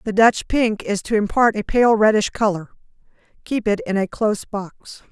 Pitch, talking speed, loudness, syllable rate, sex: 210 Hz, 190 wpm, -19 LUFS, 4.8 syllables/s, female